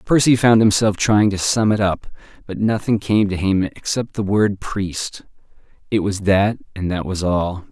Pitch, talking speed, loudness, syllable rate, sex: 100 Hz, 185 wpm, -18 LUFS, 4.4 syllables/s, male